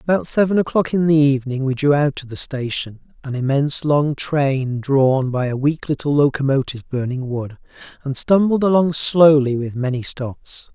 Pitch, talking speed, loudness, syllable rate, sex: 140 Hz, 175 wpm, -18 LUFS, 4.8 syllables/s, male